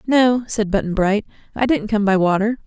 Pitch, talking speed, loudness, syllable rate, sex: 215 Hz, 205 wpm, -18 LUFS, 5.1 syllables/s, female